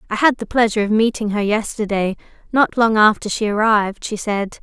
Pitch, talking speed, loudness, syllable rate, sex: 215 Hz, 195 wpm, -18 LUFS, 5.7 syllables/s, female